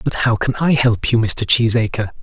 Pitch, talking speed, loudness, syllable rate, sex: 115 Hz, 215 wpm, -16 LUFS, 4.9 syllables/s, male